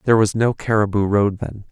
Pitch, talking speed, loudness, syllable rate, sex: 105 Hz, 210 wpm, -18 LUFS, 5.7 syllables/s, male